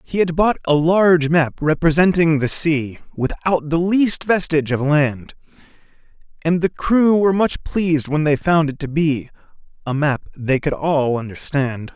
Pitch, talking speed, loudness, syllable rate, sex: 155 Hz, 165 wpm, -18 LUFS, 4.4 syllables/s, male